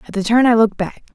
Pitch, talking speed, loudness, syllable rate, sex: 220 Hz, 315 wpm, -16 LUFS, 7.7 syllables/s, female